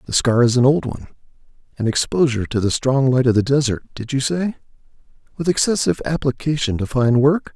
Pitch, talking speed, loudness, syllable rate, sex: 130 Hz, 175 wpm, -18 LUFS, 6.1 syllables/s, male